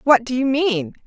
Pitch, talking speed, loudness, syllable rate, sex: 260 Hz, 225 wpm, -19 LUFS, 4.6 syllables/s, female